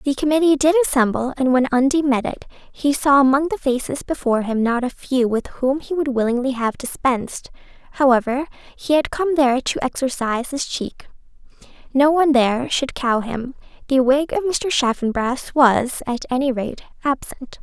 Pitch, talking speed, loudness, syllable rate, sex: 265 Hz, 175 wpm, -19 LUFS, 5.1 syllables/s, female